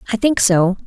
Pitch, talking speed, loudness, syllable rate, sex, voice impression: 210 Hz, 210 wpm, -15 LUFS, 5.8 syllables/s, female, feminine, adult-like, tensed, bright, clear, fluent, slightly intellectual, calm, elegant, slightly lively, slightly sharp